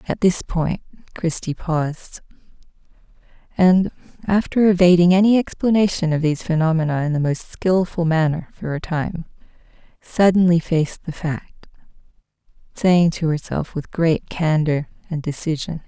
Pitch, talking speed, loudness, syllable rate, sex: 170 Hz, 125 wpm, -19 LUFS, 4.7 syllables/s, female